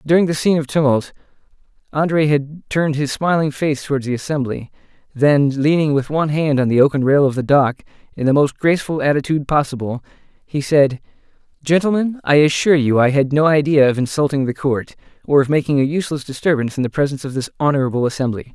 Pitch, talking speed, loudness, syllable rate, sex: 145 Hz, 190 wpm, -17 LUFS, 6.4 syllables/s, male